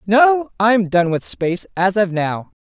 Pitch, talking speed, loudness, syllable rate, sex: 200 Hz, 180 wpm, -17 LUFS, 4.0 syllables/s, female